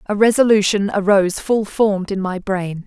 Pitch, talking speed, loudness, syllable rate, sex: 200 Hz, 165 wpm, -17 LUFS, 5.1 syllables/s, female